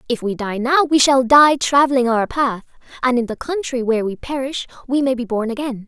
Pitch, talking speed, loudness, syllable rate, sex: 255 Hz, 225 wpm, -17 LUFS, 5.5 syllables/s, female